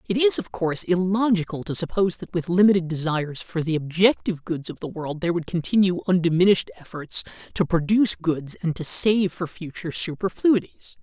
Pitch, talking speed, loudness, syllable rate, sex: 175 Hz, 175 wpm, -22 LUFS, 5.8 syllables/s, male